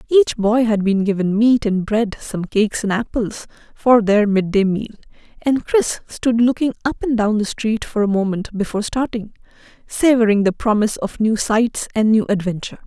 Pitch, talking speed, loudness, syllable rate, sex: 220 Hz, 180 wpm, -18 LUFS, 5.1 syllables/s, female